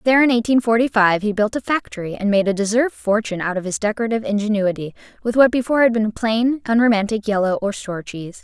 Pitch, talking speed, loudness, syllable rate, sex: 215 Hz, 215 wpm, -19 LUFS, 6.8 syllables/s, female